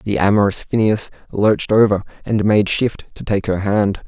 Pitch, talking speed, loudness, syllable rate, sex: 105 Hz, 175 wpm, -17 LUFS, 4.8 syllables/s, male